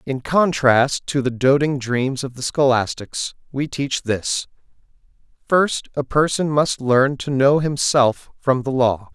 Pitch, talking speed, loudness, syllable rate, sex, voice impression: 135 Hz, 150 wpm, -19 LUFS, 3.7 syllables/s, male, masculine, adult-like, tensed, bright, clear, slightly halting, friendly, wild, lively, slightly kind, slightly modest